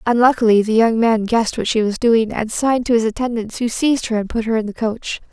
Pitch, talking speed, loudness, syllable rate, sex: 230 Hz, 260 wpm, -17 LUFS, 6.1 syllables/s, female